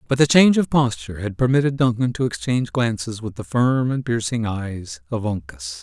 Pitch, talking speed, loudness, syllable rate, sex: 115 Hz, 195 wpm, -20 LUFS, 5.4 syllables/s, male